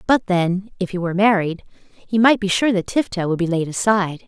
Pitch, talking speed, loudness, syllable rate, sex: 190 Hz, 225 wpm, -19 LUFS, 5.5 syllables/s, female